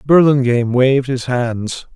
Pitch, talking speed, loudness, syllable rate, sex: 130 Hz, 125 wpm, -15 LUFS, 4.5 syllables/s, male